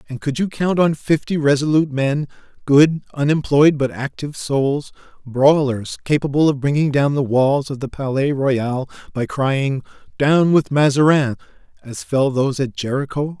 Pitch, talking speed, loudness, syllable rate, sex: 140 Hz, 150 wpm, -18 LUFS, 4.6 syllables/s, male